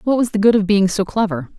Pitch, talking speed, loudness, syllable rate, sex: 205 Hz, 300 wpm, -16 LUFS, 6.3 syllables/s, female